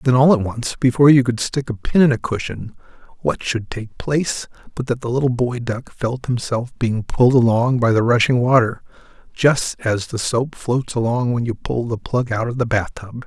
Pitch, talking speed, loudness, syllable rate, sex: 120 Hz, 215 wpm, -19 LUFS, 5.0 syllables/s, male